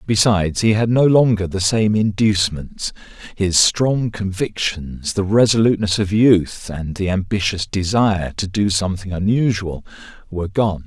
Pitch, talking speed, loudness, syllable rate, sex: 100 Hz, 140 wpm, -18 LUFS, 4.7 syllables/s, male